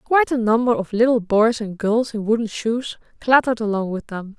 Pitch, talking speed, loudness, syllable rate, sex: 225 Hz, 205 wpm, -19 LUFS, 5.4 syllables/s, female